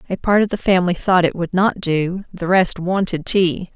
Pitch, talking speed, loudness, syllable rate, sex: 180 Hz, 225 wpm, -18 LUFS, 4.9 syllables/s, female